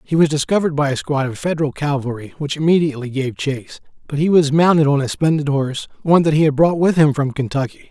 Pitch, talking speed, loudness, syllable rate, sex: 145 Hz, 230 wpm, -17 LUFS, 6.6 syllables/s, male